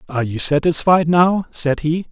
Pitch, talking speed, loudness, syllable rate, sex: 160 Hz, 170 wpm, -16 LUFS, 4.8 syllables/s, male